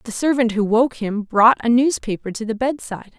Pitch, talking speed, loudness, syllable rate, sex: 230 Hz, 205 wpm, -18 LUFS, 5.4 syllables/s, female